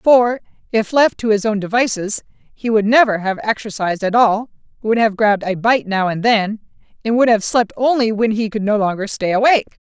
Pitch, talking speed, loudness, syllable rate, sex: 220 Hz, 205 wpm, -16 LUFS, 5.5 syllables/s, female